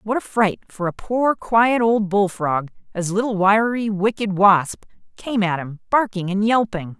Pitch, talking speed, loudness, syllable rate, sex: 205 Hz, 170 wpm, -19 LUFS, 4.2 syllables/s, female